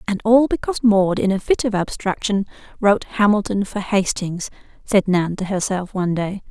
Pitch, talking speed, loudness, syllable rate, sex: 200 Hz, 175 wpm, -19 LUFS, 5.4 syllables/s, female